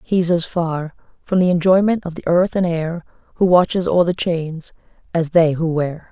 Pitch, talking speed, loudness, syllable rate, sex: 170 Hz, 195 wpm, -18 LUFS, 4.8 syllables/s, female